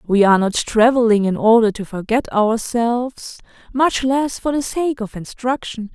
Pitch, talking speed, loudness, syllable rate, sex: 230 Hz, 160 wpm, -17 LUFS, 4.6 syllables/s, female